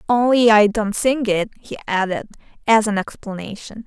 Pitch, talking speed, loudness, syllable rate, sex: 215 Hz, 155 wpm, -18 LUFS, 4.8 syllables/s, female